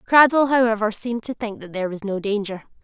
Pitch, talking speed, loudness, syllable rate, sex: 220 Hz, 210 wpm, -21 LUFS, 6.5 syllables/s, female